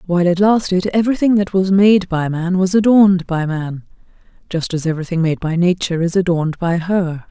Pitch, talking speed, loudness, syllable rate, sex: 180 Hz, 190 wpm, -16 LUFS, 5.8 syllables/s, female